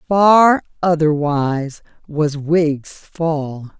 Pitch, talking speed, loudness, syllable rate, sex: 155 Hz, 80 wpm, -16 LUFS, 2.5 syllables/s, female